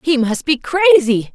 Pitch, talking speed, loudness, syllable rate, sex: 285 Hz, 180 wpm, -14 LUFS, 4.0 syllables/s, female